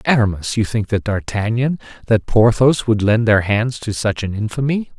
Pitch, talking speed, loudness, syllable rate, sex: 115 Hz, 180 wpm, -17 LUFS, 4.9 syllables/s, male